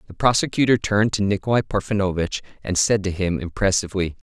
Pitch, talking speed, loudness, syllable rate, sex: 100 Hz, 155 wpm, -21 LUFS, 6.3 syllables/s, male